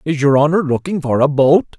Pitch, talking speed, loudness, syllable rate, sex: 150 Hz, 235 wpm, -14 LUFS, 5.4 syllables/s, male